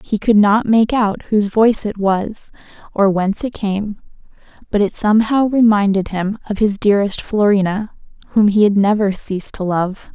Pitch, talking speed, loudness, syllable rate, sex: 205 Hz, 170 wpm, -16 LUFS, 5.0 syllables/s, female